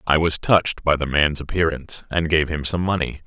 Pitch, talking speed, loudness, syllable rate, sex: 80 Hz, 220 wpm, -20 LUFS, 5.5 syllables/s, male